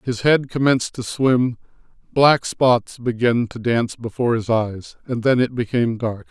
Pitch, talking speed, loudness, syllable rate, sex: 120 Hz, 170 wpm, -19 LUFS, 4.7 syllables/s, male